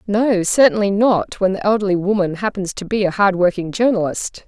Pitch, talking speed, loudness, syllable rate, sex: 195 Hz, 175 wpm, -17 LUFS, 5.3 syllables/s, female